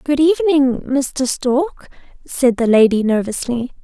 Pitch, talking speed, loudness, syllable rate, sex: 265 Hz, 125 wpm, -16 LUFS, 4.0 syllables/s, female